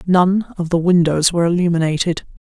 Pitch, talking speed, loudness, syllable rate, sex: 175 Hz, 145 wpm, -16 LUFS, 5.7 syllables/s, female